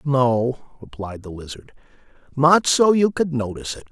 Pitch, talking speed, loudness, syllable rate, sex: 130 Hz, 155 wpm, -19 LUFS, 4.8 syllables/s, male